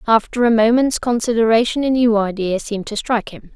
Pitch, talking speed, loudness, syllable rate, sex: 225 Hz, 185 wpm, -17 LUFS, 5.9 syllables/s, female